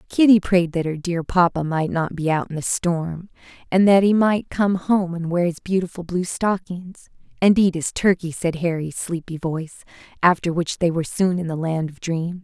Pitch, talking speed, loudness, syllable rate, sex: 175 Hz, 205 wpm, -21 LUFS, 4.9 syllables/s, female